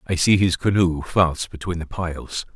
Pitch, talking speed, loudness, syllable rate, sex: 85 Hz, 190 wpm, -21 LUFS, 4.7 syllables/s, male